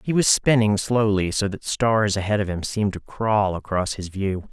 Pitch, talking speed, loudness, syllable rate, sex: 105 Hz, 210 wpm, -22 LUFS, 4.8 syllables/s, male